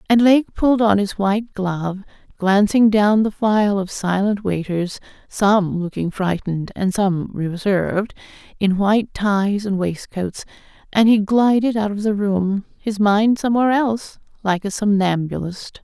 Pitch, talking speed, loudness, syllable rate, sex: 205 Hz, 135 wpm, -19 LUFS, 4.4 syllables/s, female